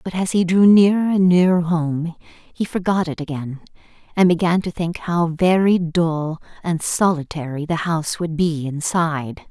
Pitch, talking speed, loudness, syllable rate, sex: 170 Hz, 165 wpm, -19 LUFS, 4.4 syllables/s, female